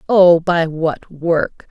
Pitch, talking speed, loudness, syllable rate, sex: 170 Hz, 140 wpm, -15 LUFS, 2.6 syllables/s, female